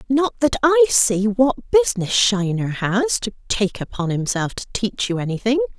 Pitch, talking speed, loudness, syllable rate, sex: 235 Hz, 165 wpm, -19 LUFS, 4.7 syllables/s, female